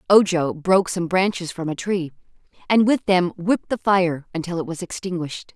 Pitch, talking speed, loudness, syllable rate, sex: 180 Hz, 185 wpm, -21 LUFS, 5.3 syllables/s, female